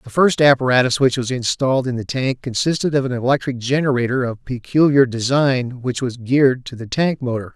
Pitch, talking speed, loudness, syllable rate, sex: 130 Hz, 190 wpm, -18 LUFS, 5.5 syllables/s, male